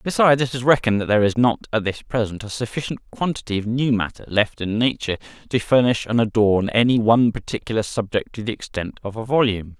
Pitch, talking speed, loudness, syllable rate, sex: 115 Hz, 210 wpm, -21 LUFS, 6.3 syllables/s, male